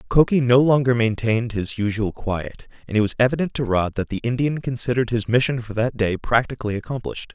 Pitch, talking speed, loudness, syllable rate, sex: 120 Hz, 195 wpm, -21 LUFS, 6.3 syllables/s, male